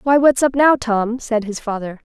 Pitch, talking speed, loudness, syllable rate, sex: 240 Hz, 225 wpm, -17 LUFS, 4.6 syllables/s, female